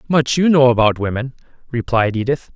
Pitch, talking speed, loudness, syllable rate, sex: 125 Hz, 165 wpm, -16 LUFS, 5.4 syllables/s, male